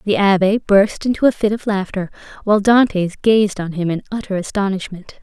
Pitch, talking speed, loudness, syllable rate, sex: 200 Hz, 185 wpm, -17 LUFS, 5.4 syllables/s, female